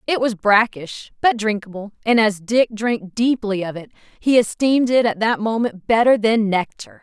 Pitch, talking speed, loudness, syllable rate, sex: 215 Hz, 180 wpm, -18 LUFS, 4.7 syllables/s, female